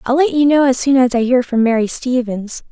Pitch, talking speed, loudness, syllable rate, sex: 250 Hz, 265 wpm, -15 LUFS, 5.5 syllables/s, female